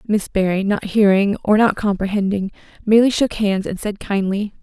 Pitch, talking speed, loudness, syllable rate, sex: 205 Hz, 170 wpm, -18 LUFS, 5.3 syllables/s, female